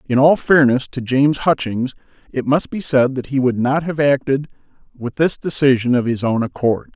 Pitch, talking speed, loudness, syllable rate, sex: 135 Hz, 200 wpm, -17 LUFS, 5.0 syllables/s, male